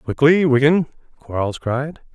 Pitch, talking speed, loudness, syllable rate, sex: 140 Hz, 110 wpm, -18 LUFS, 4.0 syllables/s, male